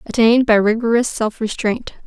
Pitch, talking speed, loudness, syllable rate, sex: 225 Hz, 145 wpm, -17 LUFS, 5.4 syllables/s, female